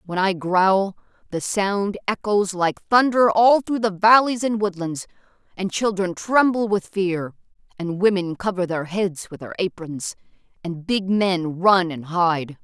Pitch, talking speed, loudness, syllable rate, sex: 190 Hz, 155 wpm, -21 LUFS, 4.0 syllables/s, female